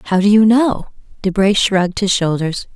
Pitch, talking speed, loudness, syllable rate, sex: 200 Hz, 175 wpm, -15 LUFS, 5.0 syllables/s, female